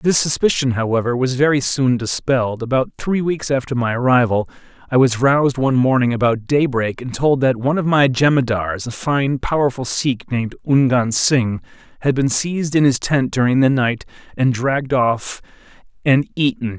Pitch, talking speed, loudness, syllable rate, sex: 130 Hz, 170 wpm, -17 LUFS, 5.1 syllables/s, male